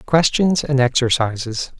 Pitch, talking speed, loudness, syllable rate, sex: 135 Hz, 100 wpm, -18 LUFS, 4.3 syllables/s, male